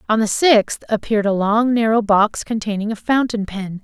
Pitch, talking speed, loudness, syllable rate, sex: 215 Hz, 190 wpm, -18 LUFS, 5.0 syllables/s, female